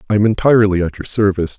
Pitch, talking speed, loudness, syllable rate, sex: 100 Hz, 230 wpm, -15 LUFS, 7.9 syllables/s, male